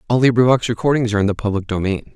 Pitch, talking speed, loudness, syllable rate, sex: 110 Hz, 225 wpm, -17 LUFS, 7.7 syllables/s, male